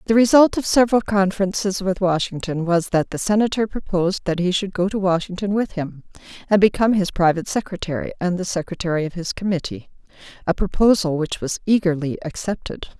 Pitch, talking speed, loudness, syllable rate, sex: 190 Hz, 170 wpm, -20 LUFS, 6.0 syllables/s, female